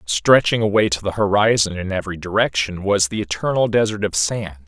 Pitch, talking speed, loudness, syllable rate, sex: 100 Hz, 180 wpm, -18 LUFS, 5.6 syllables/s, male